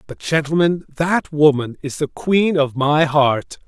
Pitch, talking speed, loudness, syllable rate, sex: 150 Hz, 165 wpm, -18 LUFS, 4.0 syllables/s, male